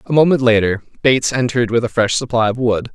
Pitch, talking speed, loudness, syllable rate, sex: 120 Hz, 225 wpm, -16 LUFS, 6.5 syllables/s, male